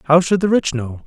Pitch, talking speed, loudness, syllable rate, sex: 160 Hz, 285 wpm, -17 LUFS, 5.8 syllables/s, male